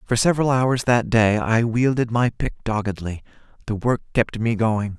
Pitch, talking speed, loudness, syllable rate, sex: 115 Hz, 180 wpm, -21 LUFS, 4.6 syllables/s, male